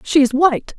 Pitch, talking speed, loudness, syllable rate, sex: 285 Hz, 230 wpm, -15 LUFS, 6.1 syllables/s, female